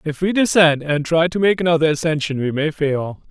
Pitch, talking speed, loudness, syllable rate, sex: 160 Hz, 220 wpm, -17 LUFS, 5.4 syllables/s, male